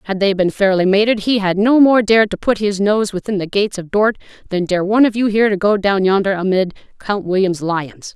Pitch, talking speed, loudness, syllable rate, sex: 200 Hz, 245 wpm, -15 LUFS, 5.8 syllables/s, female